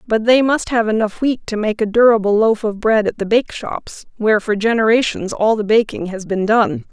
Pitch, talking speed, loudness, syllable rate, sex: 220 Hz, 215 wpm, -16 LUFS, 5.3 syllables/s, female